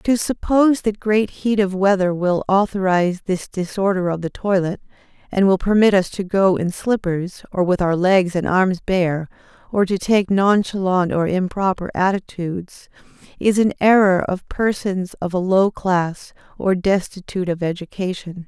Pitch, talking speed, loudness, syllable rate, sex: 190 Hz, 160 wpm, -19 LUFS, 4.6 syllables/s, female